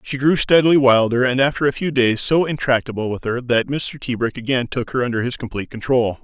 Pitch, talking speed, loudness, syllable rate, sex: 125 Hz, 220 wpm, -18 LUFS, 5.9 syllables/s, male